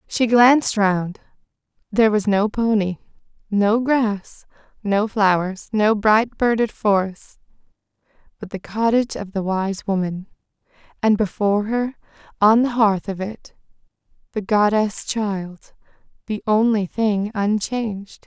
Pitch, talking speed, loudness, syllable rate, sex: 210 Hz, 115 wpm, -20 LUFS, 4.0 syllables/s, female